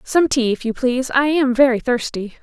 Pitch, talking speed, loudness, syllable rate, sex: 255 Hz, 225 wpm, -18 LUFS, 5.2 syllables/s, female